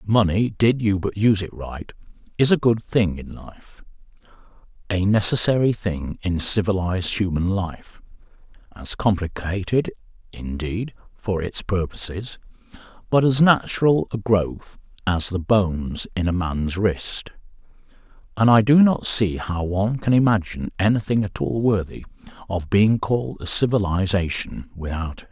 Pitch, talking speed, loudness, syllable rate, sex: 100 Hz, 135 wpm, -21 LUFS, 4.5 syllables/s, male